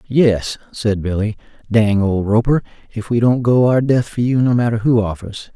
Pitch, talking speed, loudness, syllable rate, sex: 115 Hz, 195 wpm, -16 LUFS, 4.7 syllables/s, male